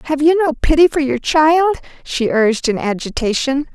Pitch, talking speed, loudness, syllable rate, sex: 285 Hz, 175 wpm, -15 LUFS, 5.1 syllables/s, female